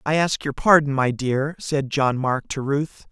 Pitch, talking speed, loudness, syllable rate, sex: 140 Hz, 210 wpm, -21 LUFS, 4.1 syllables/s, male